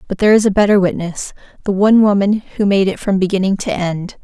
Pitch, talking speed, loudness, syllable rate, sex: 195 Hz, 225 wpm, -14 LUFS, 6.2 syllables/s, female